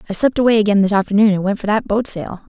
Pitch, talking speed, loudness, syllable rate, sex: 210 Hz, 285 wpm, -16 LUFS, 7.4 syllables/s, female